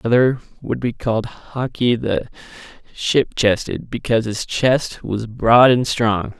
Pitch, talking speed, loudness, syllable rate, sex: 120 Hz, 150 wpm, -18 LUFS, 4.1 syllables/s, male